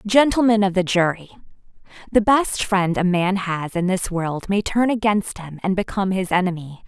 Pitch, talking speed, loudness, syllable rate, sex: 190 Hz, 185 wpm, -20 LUFS, 5.0 syllables/s, female